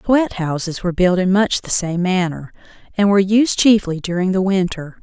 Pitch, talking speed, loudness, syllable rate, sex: 185 Hz, 190 wpm, -17 LUFS, 5.1 syllables/s, female